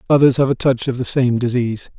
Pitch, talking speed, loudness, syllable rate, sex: 125 Hz, 240 wpm, -17 LUFS, 6.3 syllables/s, male